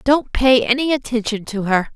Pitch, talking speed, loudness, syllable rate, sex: 240 Hz, 185 wpm, -18 LUFS, 4.9 syllables/s, female